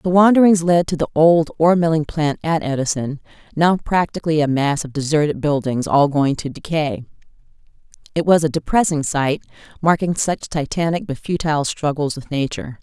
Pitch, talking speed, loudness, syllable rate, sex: 155 Hz, 165 wpm, -18 LUFS, 5.4 syllables/s, female